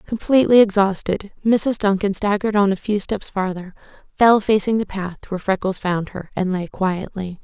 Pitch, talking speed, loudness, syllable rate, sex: 200 Hz, 170 wpm, -19 LUFS, 5.1 syllables/s, female